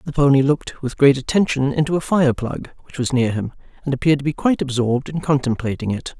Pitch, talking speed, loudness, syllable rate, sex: 140 Hz, 225 wpm, -19 LUFS, 6.4 syllables/s, female